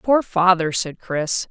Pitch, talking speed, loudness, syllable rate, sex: 180 Hz, 160 wpm, -19 LUFS, 3.4 syllables/s, female